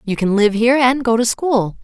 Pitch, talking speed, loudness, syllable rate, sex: 230 Hz, 260 wpm, -15 LUFS, 5.4 syllables/s, female